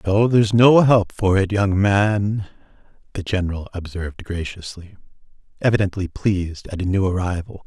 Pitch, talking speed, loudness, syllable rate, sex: 100 Hz, 140 wpm, -19 LUFS, 5.0 syllables/s, male